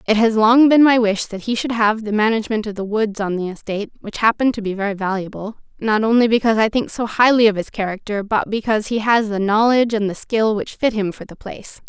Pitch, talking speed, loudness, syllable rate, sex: 215 Hz, 245 wpm, -18 LUFS, 6.1 syllables/s, female